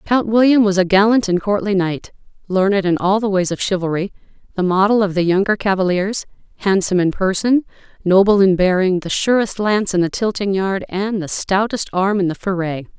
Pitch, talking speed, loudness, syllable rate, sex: 195 Hz, 190 wpm, -17 LUFS, 5.5 syllables/s, female